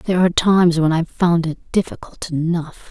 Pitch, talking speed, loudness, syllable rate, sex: 170 Hz, 185 wpm, -18 LUFS, 5.6 syllables/s, female